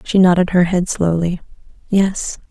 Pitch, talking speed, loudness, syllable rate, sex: 180 Hz, 145 wpm, -16 LUFS, 4.4 syllables/s, female